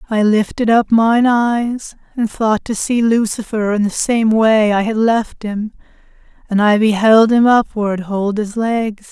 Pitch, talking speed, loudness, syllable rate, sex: 220 Hz, 170 wpm, -15 LUFS, 3.9 syllables/s, female